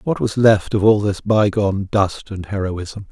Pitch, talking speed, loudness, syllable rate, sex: 100 Hz, 195 wpm, -18 LUFS, 4.3 syllables/s, male